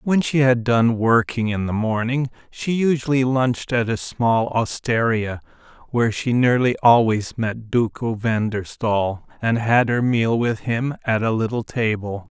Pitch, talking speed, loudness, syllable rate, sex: 120 Hz, 165 wpm, -20 LUFS, 4.2 syllables/s, male